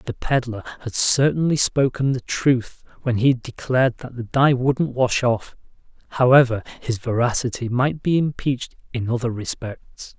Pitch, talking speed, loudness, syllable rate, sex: 125 Hz, 145 wpm, -21 LUFS, 4.6 syllables/s, male